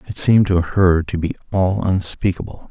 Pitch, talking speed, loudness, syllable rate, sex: 90 Hz, 180 wpm, -18 LUFS, 5.1 syllables/s, male